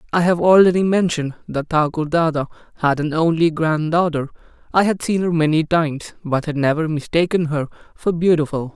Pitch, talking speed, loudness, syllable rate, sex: 160 Hz, 170 wpm, -18 LUFS, 5.6 syllables/s, male